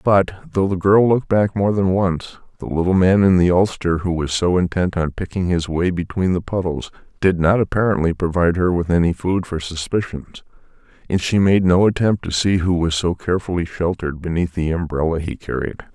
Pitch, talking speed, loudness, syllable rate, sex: 90 Hz, 200 wpm, -19 LUFS, 5.4 syllables/s, male